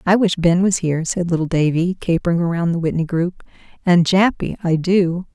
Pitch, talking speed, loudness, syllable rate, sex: 175 Hz, 190 wpm, -18 LUFS, 5.4 syllables/s, female